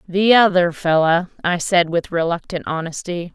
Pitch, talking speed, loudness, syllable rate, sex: 175 Hz, 145 wpm, -18 LUFS, 4.6 syllables/s, female